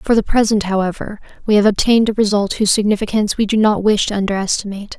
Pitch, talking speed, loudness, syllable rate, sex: 210 Hz, 215 wpm, -16 LUFS, 7.0 syllables/s, female